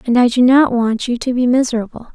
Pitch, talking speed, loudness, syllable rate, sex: 245 Hz, 250 wpm, -14 LUFS, 6.0 syllables/s, female